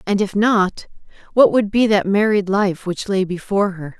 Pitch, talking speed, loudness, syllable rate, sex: 200 Hz, 195 wpm, -17 LUFS, 4.8 syllables/s, female